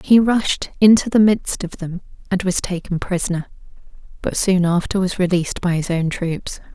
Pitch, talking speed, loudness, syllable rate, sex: 185 Hz, 180 wpm, -19 LUFS, 5.0 syllables/s, female